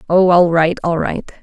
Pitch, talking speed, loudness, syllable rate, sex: 170 Hz, 210 wpm, -14 LUFS, 4.5 syllables/s, female